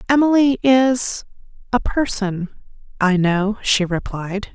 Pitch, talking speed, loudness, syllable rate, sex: 220 Hz, 80 wpm, -18 LUFS, 3.6 syllables/s, female